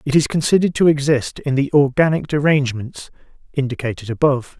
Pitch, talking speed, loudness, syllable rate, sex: 140 Hz, 145 wpm, -18 LUFS, 6.2 syllables/s, male